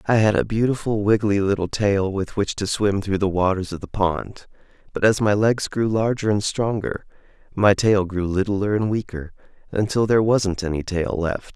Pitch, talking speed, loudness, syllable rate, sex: 100 Hz, 190 wpm, -21 LUFS, 4.9 syllables/s, male